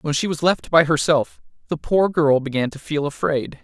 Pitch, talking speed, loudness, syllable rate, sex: 150 Hz, 215 wpm, -20 LUFS, 4.9 syllables/s, male